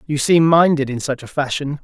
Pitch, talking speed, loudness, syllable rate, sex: 145 Hz, 230 wpm, -17 LUFS, 5.4 syllables/s, male